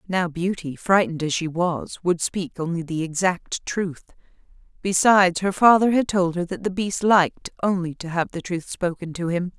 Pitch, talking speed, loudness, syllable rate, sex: 180 Hz, 190 wpm, -22 LUFS, 4.8 syllables/s, female